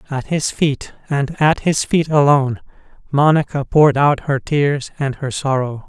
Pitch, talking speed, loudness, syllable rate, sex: 140 Hz, 165 wpm, -17 LUFS, 4.5 syllables/s, male